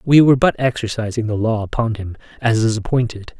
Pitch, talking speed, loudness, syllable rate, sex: 115 Hz, 195 wpm, -18 LUFS, 6.0 syllables/s, male